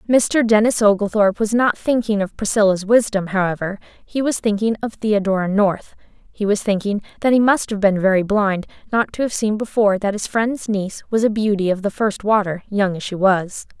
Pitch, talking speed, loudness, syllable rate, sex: 205 Hz, 200 wpm, -18 LUFS, 5.3 syllables/s, female